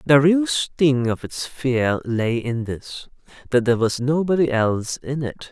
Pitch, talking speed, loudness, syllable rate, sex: 130 Hz, 165 wpm, -21 LUFS, 4.1 syllables/s, male